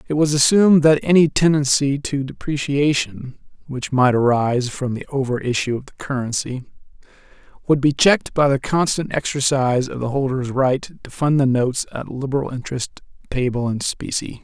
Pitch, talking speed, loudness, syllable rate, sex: 135 Hz, 165 wpm, -19 LUFS, 5.3 syllables/s, male